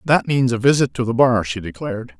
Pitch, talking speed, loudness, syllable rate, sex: 120 Hz, 245 wpm, -18 LUFS, 5.7 syllables/s, male